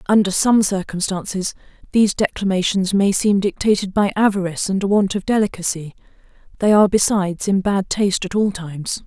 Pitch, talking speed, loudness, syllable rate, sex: 195 Hz, 160 wpm, -18 LUFS, 5.7 syllables/s, female